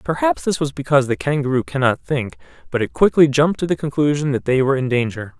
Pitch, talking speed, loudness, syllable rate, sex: 135 Hz, 225 wpm, -18 LUFS, 6.5 syllables/s, male